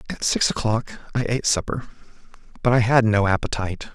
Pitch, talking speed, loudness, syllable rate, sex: 115 Hz, 165 wpm, -22 LUFS, 5.9 syllables/s, male